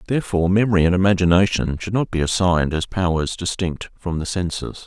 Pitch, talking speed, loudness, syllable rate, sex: 90 Hz, 175 wpm, -20 LUFS, 6.0 syllables/s, male